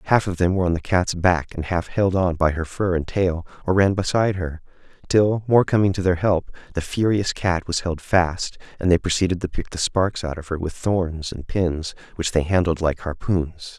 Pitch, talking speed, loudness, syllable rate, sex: 90 Hz, 225 wpm, -22 LUFS, 5.0 syllables/s, male